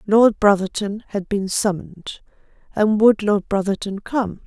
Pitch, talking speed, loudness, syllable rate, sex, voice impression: 205 Hz, 135 wpm, -19 LUFS, 4.3 syllables/s, female, feminine, adult-like, slightly calm, friendly, slightly sweet, slightly kind